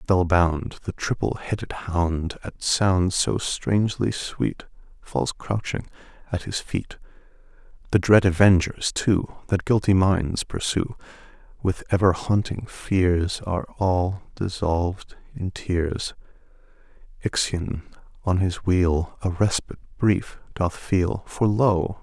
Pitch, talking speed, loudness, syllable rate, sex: 90 Hz, 120 wpm, -24 LUFS, 3.6 syllables/s, male